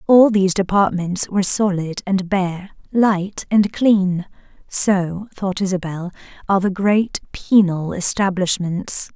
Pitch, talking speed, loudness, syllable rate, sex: 190 Hz, 120 wpm, -18 LUFS, 3.9 syllables/s, female